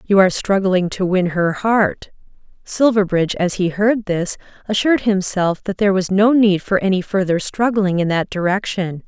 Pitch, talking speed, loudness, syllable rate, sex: 195 Hz, 170 wpm, -17 LUFS, 4.9 syllables/s, female